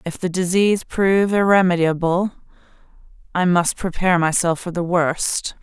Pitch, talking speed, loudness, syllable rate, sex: 180 Hz, 130 wpm, -19 LUFS, 4.9 syllables/s, female